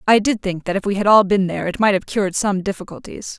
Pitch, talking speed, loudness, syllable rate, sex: 200 Hz, 285 wpm, -18 LUFS, 6.5 syllables/s, female